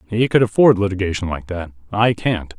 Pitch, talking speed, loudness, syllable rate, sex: 100 Hz, 185 wpm, -18 LUFS, 5.4 syllables/s, male